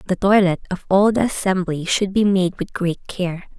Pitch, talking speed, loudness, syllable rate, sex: 185 Hz, 200 wpm, -19 LUFS, 4.8 syllables/s, female